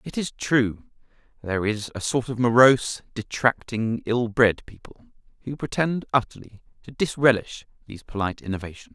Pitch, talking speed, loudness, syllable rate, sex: 120 Hz, 140 wpm, -23 LUFS, 5.3 syllables/s, male